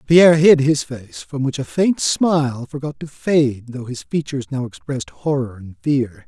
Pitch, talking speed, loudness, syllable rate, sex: 135 Hz, 190 wpm, -19 LUFS, 4.7 syllables/s, male